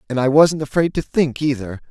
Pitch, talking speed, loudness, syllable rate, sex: 140 Hz, 220 wpm, -18 LUFS, 5.5 syllables/s, male